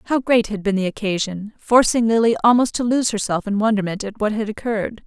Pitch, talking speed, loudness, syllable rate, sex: 215 Hz, 215 wpm, -19 LUFS, 5.6 syllables/s, female